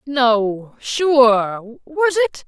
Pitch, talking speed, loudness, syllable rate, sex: 260 Hz, 95 wpm, -17 LUFS, 1.8 syllables/s, female